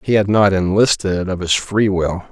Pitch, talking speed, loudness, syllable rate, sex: 95 Hz, 205 wpm, -16 LUFS, 4.6 syllables/s, male